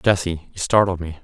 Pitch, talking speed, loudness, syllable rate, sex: 90 Hz, 195 wpm, -20 LUFS, 5.7 syllables/s, male